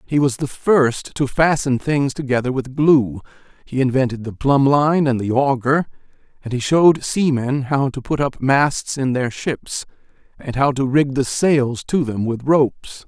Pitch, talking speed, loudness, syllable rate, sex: 135 Hz, 185 wpm, -18 LUFS, 4.3 syllables/s, male